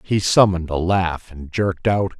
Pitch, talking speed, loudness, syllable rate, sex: 90 Hz, 190 wpm, -19 LUFS, 4.9 syllables/s, male